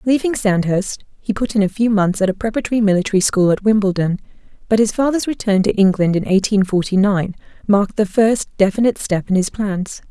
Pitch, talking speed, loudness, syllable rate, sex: 205 Hz, 195 wpm, -17 LUFS, 6.0 syllables/s, female